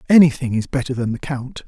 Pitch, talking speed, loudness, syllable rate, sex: 135 Hz, 215 wpm, -19 LUFS, 6.1 syllables/s, male